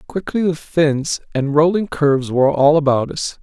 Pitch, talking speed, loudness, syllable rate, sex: 150 Hz, 175 wpm, -17 LUFS, 4.8 syllables/s, male